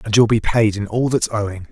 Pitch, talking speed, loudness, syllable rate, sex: 110 Hz, 245 wpm, -18 LUFS, 5.0 syllables/s, male